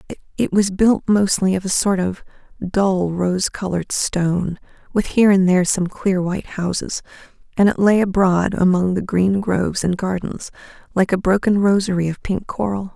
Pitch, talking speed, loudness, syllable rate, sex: 190 Hz, 170 wpm, -18 LUFS, 5.0 syllables/s, female